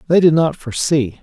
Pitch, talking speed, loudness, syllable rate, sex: 150 Hz, 195 wpm, -16 LUFS, 5.8 syllables/s, male